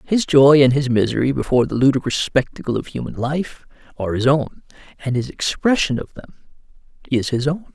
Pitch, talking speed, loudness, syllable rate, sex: 135 Hz, 180 wpm, -18 LUFS, 5.7 syllables/s, male